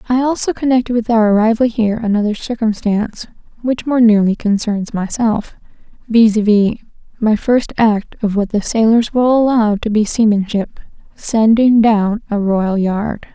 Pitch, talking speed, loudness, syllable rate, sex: 220 Hz, 140 wpm, -15 LUFS, 4.6 syllables/s, female